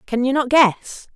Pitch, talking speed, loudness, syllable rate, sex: 260 Hz, 210 wpm, -17 LUFS, 4.1 syllables/s, female